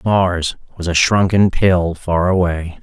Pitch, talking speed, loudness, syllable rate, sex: 90 Hz, 150 wpm, -16 LUFS, 3.6 syllables/s, male